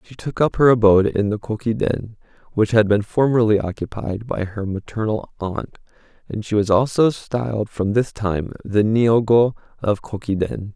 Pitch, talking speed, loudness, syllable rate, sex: 110 Hz, 160 wpm, -20 LUFS, 4.7 syllables/s, male